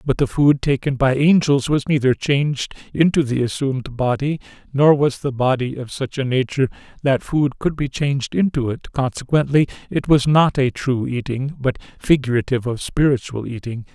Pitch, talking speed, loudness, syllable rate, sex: 135 Hz, 170 wpm, -19 LUFS, 5.1 syllables/s, male